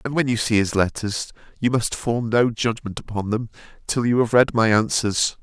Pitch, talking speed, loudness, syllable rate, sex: 115 Hz, 210 wpm, -21 LUFS, 4.9 syllables/s, male